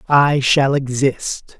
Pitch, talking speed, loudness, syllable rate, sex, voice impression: 135 Hz, 115 wpm, -16 LUFS, 2.8 syllables/s, male, masculine, adult-like, relaxed, slightly bright, soft, slightly muffled, intellectual, calm, friendly, reassuring, slightly wild, kind, modest